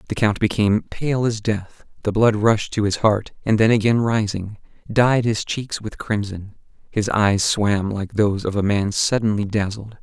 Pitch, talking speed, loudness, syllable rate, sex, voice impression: 105 Hz, 185 wpm, -20 LUFS, 4.5 syllables/s, male, masculine, adult-like, slightly thin, relaxed, slightly soft, clear, slightly nasal, cool, refreshing, friendly, reassuring, lively, kind